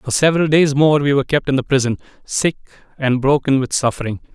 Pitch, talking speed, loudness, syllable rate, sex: 140 Hz, 205 wpm, -17 LUFS, 6.2 syllables/s, male